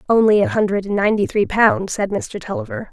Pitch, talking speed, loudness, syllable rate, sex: 210 Hz, 205 wpm, -18 LUFS, 5.9 syllables/s, female